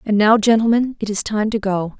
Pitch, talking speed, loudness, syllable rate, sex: 215 Hz, 240 wpm, -17 LUFS, 5.4 syllables/s, female